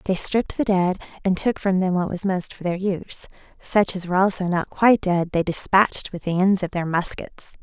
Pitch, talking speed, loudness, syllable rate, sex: 185 Hz, 230 wpm, -22 LUFS, 5.6 syllables/s, female